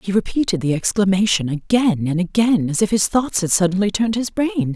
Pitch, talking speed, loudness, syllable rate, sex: 200 Hz, 200 wpm, -18 LUFS, 5.7 syllables/s, female